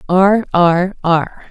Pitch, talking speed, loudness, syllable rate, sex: 180 Hz, 120 wpm, -14 LUFS, 2.6 syllables/s, female